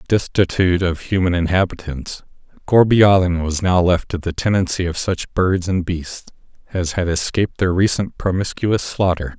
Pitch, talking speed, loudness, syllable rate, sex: 90 Hz, 155 wpm, -18 LUFS, 4.9 syllables/s, male